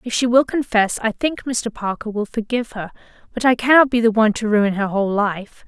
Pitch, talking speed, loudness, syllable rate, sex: 225 Hz, 230 wpm, -18 LUFS, 5.7 syllables/s, female